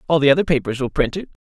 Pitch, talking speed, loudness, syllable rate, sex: 150 Hz, 285 wpm, -19 LUFS, 8.0 syllables/s, male